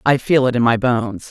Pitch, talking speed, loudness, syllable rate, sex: 125 Hz, 275 wpm, -16 LUFS, 5.8 syllables/s, female